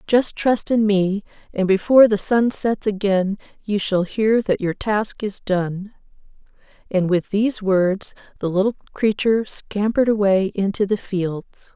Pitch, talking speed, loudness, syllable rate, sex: 205 Hz, 155 wpm, -20 LUFS, 4.2 syllables/s, female